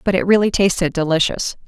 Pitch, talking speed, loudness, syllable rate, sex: 185 Hz, 180 wpm, -17 LUFS, 6.0 syllables/s, female